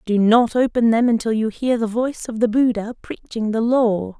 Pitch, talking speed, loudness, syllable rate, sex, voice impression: 225 Hz, 215 wpm, -19 LUFS, 5.0 syllables/s, female, very feminine, very adult-like, very thin, slightly tensed, weak, dark, soft, very muffled, fluent, very raspy, cute, intellectual, slightly refreshing, sincere, slightly calm, friendly, slightly reassuring, very unique, elegant, wild, slightly sweet, lively, strict, intense, slightly sharp, light